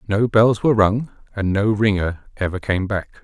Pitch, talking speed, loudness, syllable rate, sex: 105 Hz, 185 wpm, -19 LUFS, 4.9 syllables/s, male